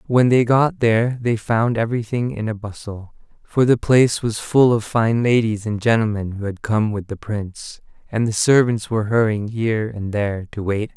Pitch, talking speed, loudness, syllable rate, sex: 110 Hz, 210 wpm, -19 LUFS, 5.2 syllables/s, male